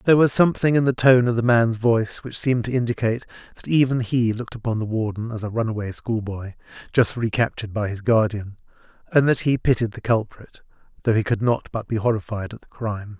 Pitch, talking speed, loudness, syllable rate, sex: 115 Hz, 210 wpm, -21 LUFS, 6.1 syllables/s, male